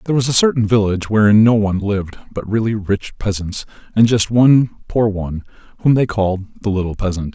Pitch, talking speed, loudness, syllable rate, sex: 105 Hz, 195 wpm, -16 LUFS, 5.9 syllables/s, male